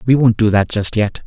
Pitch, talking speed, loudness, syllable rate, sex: 110 Hz, 285 wpm, -15 LUFS, 5.2 syllables/s, male